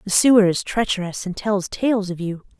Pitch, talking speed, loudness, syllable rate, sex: 200 Hz, 210 wpm, -20 LUFS, 5.0 syllables/s, female